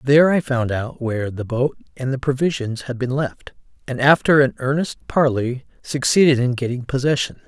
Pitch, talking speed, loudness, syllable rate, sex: 130 Hz, 175 wpm, -19 LUFS, 5.2 syllables/s, male